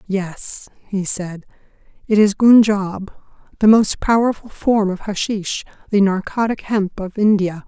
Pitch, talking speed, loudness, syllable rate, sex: 200 Hz, 135 wpm, -17 LUFS, 4.0 syllables/s, female